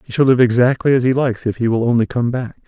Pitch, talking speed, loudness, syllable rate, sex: 120 Hz, 290 wpm, -16 LUFS, 6.7 syllables/s, male